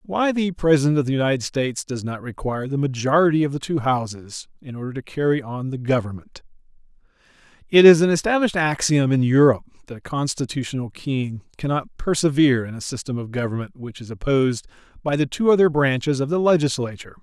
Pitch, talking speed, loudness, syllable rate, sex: 140 Hz, 180 wpm, -21 LUFS, 6.1 syllables/s, male